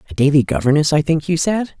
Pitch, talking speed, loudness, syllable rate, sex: 150 Hz, 235 wpm, -16 LUFS, 6.4 syllables/s, female